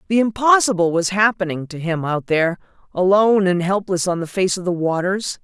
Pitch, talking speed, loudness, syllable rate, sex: 185 Hz, 190 wpm, -18 LUFS, 5.5 syllables/s, female